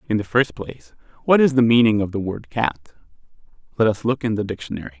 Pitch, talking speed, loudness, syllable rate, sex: 110 Hz, 215 wpm, -20 LUFS, 6.3 syllables/s, male